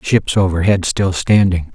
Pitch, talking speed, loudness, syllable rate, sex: 95 Hz, 135 wpm, -15 LUFS, 4.1 syllables/s, male